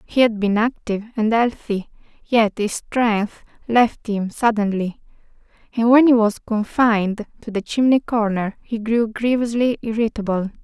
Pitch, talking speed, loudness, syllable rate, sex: 220 Hz, 140 wpm, -19 LUFS, 4.5 syllables/s, female